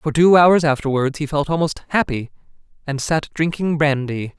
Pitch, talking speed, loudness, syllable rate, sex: 150 Hz, 165 wpm, -18 LUFS, 4.9 syllables/s, male